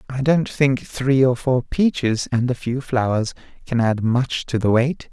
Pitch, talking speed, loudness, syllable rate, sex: 125 Hz, 200 wpm, -20 LUFS, 4.1 syllables/s, male